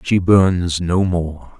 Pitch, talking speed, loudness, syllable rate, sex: 90 Hz, 150 wpm, -16 LUFS, 2.8 syllables/s, male